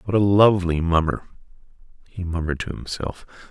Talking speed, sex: 135 wpm, male